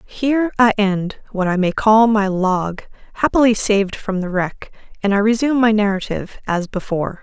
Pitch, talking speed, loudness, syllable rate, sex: 205 Hz, 175 wpm, -17 LUFS, 5.2 syllables/s, female